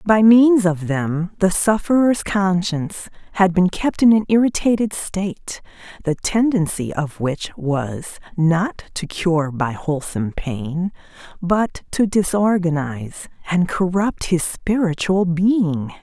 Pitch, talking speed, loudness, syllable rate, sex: 180 Hz, 125 wpm, -19 LUFS, 4.0 syllables/s, female